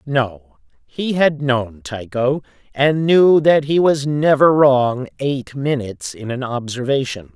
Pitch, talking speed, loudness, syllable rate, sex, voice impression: 135 Hz, 140 wpm, -17 LUFS, 3.7 syllables/s, male, masculine, adult-like, slightly middle-aged, slightly thick, very tensed, slightly powerful, very bright, slightly hard, clear, very fluent, slightly cool, intellectual, slightly refreshing, very sincere, calm, mature, friendly, reassuring, slightly unique, wild, slightly sweet, lively, kind, slightly intense